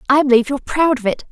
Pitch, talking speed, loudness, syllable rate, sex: 265 Hz, 275 wpm, -16 LUFS, 8.5 syllables/s, female